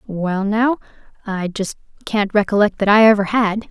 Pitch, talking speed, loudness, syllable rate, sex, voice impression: 205 Hz, 160 wpm, -17 LUFS, 4.7 syllables/s, female, feminine, slightly adult-like, fluent, slightly cute, slightly refreshing, slightly sincere, friendly